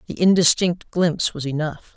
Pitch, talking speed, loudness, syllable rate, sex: 165 Hz, 155 wpm, -20 LUFS, 5.1 syllables/s, female